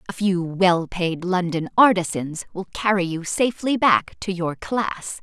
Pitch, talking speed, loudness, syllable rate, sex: 185 Hz, 160 wpm, -21 LUFS, 4.2 syllables/s, female